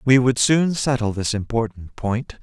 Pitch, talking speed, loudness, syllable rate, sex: 120 Hz, 175 wpm, -20 LUFS, 4.3 syllables/s, male